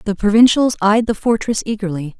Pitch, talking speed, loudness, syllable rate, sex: 210 Hz, 165 wpm, -15 LUFS, 5.6 syllables/s, female